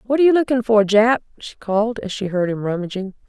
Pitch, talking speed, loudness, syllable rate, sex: 220 Hz, 240 wpm, -18 LUFS, 6.4 syllables/s, female